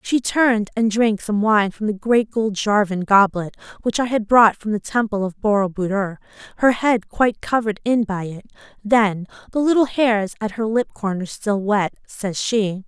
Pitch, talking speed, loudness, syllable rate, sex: 215 Hz, 190 wpm, -19 LUFS, 4.7 syllables/s, female